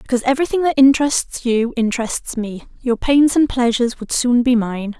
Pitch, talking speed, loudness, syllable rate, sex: 250 Hz, 180 wpm, -17 LUFS, 5.5 syllables/s, female